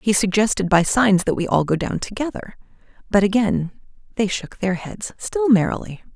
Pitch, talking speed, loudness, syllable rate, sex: 205 Hz, 175 wpm, -20 LUFS, 4.9 syllables/s, female